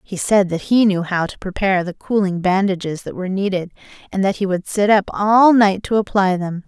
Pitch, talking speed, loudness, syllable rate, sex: 195 Hz, 225 wpm, -17 LUFS, 5.4 syllables/s, female